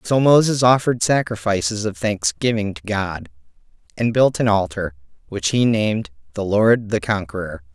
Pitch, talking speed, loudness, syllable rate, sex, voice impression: 105 Hz, 145 wpm, -19 LUFS, 4.9 syllables/s, male, very masculine, adult-like, slightly middle-aged, very thick, slightly relaxed, slightly weak, bright, hard, clear, cool, intellectual, refreshing, slightly sincere, slightly calm, mature, slightly friendly, slightly reassuring, unique, slightly wild, sweet, slightly kind, slightly modest